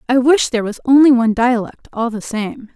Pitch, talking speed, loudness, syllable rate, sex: 240 Hz, 220 wpm, -15 LUFS, 5.7 syllables/s, female